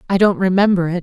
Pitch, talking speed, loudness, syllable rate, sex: 185 Hz, 235 wpm, -15 LUFS, 6.7 syllables/s, female